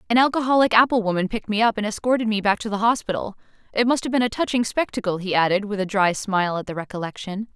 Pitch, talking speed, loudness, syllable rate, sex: 215 Hz, 240 wpm, -21 LUFS, 6.9 syllables/s, female